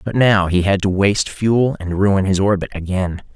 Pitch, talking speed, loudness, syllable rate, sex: 100 Hz, 215 wpm, -17 LUFS, 4.8 syllables/s, male